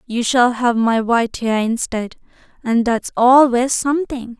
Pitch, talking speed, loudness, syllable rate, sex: 240 Hz, 150 wpm, -16 LUFS, 4.3 syllables/s, female